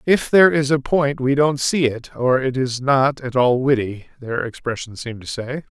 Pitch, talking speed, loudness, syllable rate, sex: 130 Hz, 215 wpm, -19 LUFS, 4.8 syllables/s, male